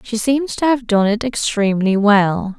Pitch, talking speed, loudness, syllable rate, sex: 220 Hz, 185 wpm, -16 LUFS, 4.4 syllables/s, female